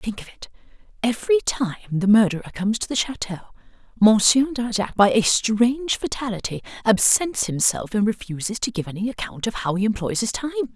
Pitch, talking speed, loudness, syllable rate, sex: 215 Hz, 165 wpm, -21 LUFS, 5.8 syllables/s, female